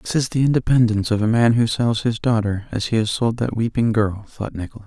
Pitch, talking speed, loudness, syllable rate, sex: 115 Hz, 260 wpm, -20 LUFS, 6.5 syllables/s, male